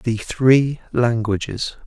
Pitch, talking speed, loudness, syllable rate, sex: 120 Hz, 95 wpm, -19 LUFS, 3.1 syllables/s, male